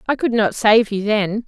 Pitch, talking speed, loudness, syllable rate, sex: 215 Hz, 245 wpm, -17 LUFS, 4.6 syllables/s, female